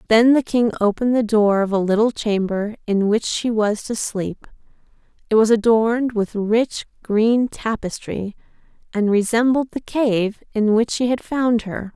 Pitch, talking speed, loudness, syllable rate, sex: 220 Hz, 165 wpm, -19 LUFS, 4.3 syllables/s, female